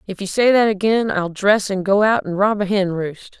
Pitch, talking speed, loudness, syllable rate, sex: 200 Hz, 265 wpm, -18 LUFS, 4.9 syllables/s, female